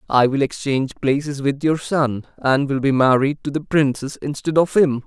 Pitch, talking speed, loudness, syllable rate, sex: 140 Hz, 200 wpm, -19 LUFS, 5.0 syllables/s, male